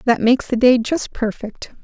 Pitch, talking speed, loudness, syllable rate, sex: 240 Hz, 195 wpm, -17 LUFS, 4.9 syllables/s, female